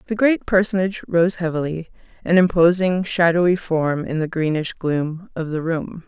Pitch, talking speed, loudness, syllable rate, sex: 170 Hz, 160 wpm, -20 LUFS, 4.8 syllables/s, female